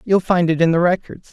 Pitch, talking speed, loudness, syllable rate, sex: 170 Hz, 275 wpm, -17 LUFS, 5.8 syllables/s, male